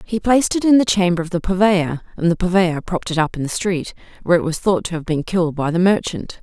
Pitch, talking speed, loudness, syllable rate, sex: 180 Hz, 270 wpm, -18 LUFS, 6.3 syllables/s, female